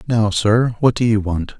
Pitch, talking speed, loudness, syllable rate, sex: 110 Hz, 225 wpm, -17 LUFS, 4.4 syllables/s, male